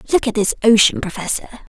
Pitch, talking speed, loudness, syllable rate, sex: 225 Hz, 170 wpm, -16 LUFS, 5.9 syllables/s, female